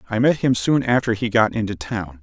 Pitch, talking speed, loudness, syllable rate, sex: 110 Hz, 245 wpm, -20 LUFS, 5.4 syllables/s, male